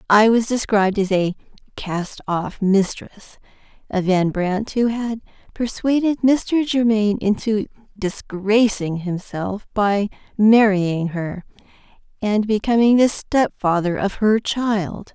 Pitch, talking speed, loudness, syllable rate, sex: 210 Hz, 120 wpm, -19 LUFS, 3.8 syllables/s, female